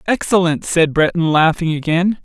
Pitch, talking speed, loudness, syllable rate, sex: 170 Hz, 135 wpm, -15 LUFS, 4.7 syllables/s, male